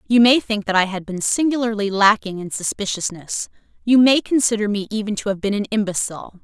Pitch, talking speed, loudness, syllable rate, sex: 210 Hz, 195 wpm, -19 LUFS, 5.7 syllables/s, female